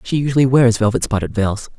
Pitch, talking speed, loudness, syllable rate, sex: 115 Hz, 200 wpm, -16 LUFS, 6.1 syllables/s, male